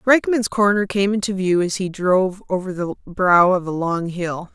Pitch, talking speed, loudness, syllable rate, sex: 190 Hz, 200 wpm, -19 LUFS, 4.7 syllables/s, female